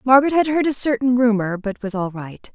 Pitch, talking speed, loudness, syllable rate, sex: 235 Hz, 235 wpm, -19 LUFS, 5.7 syllables/s, female